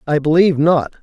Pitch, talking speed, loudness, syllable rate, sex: 155 Hz, 175 wpm, -14 LUFS, 6.1 syllables/s, male